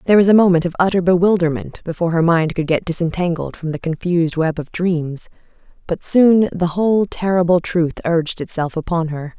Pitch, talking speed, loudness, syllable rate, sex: 170 Hz, 185 wpm, -17 LUFS, 5.7 syllables/s, female